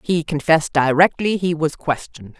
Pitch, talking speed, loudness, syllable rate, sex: 160 Hz, 150 wpm, -18 LUFS, 5.3 syllables/s, female